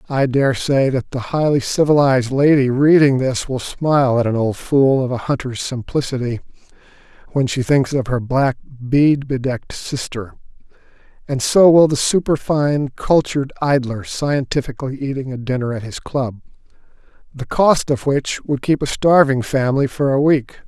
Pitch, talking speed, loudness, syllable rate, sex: 135 Hz, 160 wpm, -17 LUFS, 4.8 syllables/s, male